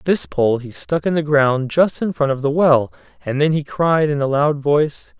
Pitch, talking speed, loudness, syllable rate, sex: 140 Hz, 245 wpm, -18 LUFS, 4.7 syllables/s, male